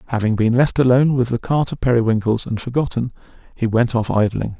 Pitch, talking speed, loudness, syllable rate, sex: 120 Hz, 195 wpm, -18 LUFS, 6.1 syllables/s, male